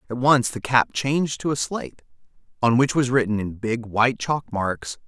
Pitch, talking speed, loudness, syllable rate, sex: 125 Hz, 200 wpm, -22 LUFS, 5.1 syllables/s, male